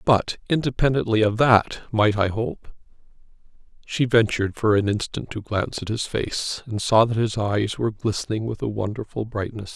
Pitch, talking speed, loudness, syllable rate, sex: 110 Hz, 170 wpm, -23 LUFS, 5.1 syllables/s, male